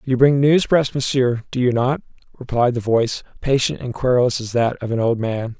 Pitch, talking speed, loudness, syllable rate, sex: 125 Hz, 215 wpm, -19 LUFS, 5.5 syllables/s, male